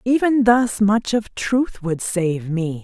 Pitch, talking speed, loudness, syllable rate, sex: 210 Hz, 170 wpm, -19 LUFS, 3.3 syllables/s, female